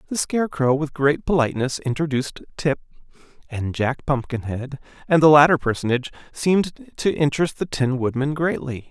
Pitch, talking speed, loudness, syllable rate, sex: 145 Hz, 140 wpm, -21 LUFS, 5.4 syllables/s, male